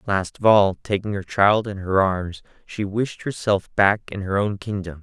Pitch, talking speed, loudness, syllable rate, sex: 100 Hz, 205 wpm, -21 LUFS, 4.3 syllables/s, male